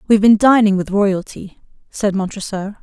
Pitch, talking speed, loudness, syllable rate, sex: 200 Hz, 170 wpm, -15 LUFS, 5.2 syllables/s, female